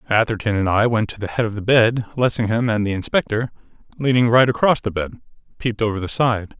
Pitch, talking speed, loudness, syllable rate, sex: 110 Hz, 210 wpm, -19 LUFS, 6.3 syllables/s, male